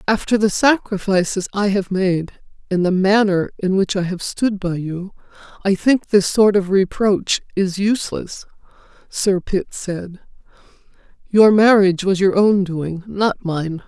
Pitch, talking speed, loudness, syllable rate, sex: 195 Hz, 150 wpm, -18 LUFS, 4.1 syllables/s, female